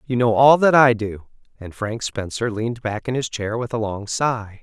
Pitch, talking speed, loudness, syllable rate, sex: 115 Hz, 235 wpm, -20 LUFS, 4.7 syllables/s, male